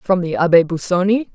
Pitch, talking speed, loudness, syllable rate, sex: 185 Hz, 180 wpm, -16 LUFS, 5.3 syllables/s, female